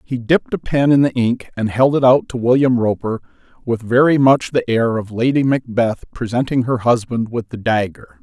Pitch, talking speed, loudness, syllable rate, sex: 120 Hz, 205 wpm, -17 LUFS, 5.1 syllables/s, male